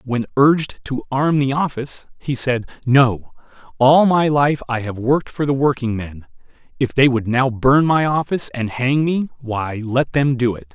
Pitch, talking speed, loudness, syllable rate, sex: 130 Hz, 185 wpm, -18 LUFS, 4.6 syllables/s, male